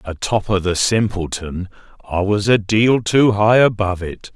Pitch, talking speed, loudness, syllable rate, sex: 100 Hz, 165 wpm, -17 LUFS, 4.4 syllables/s, male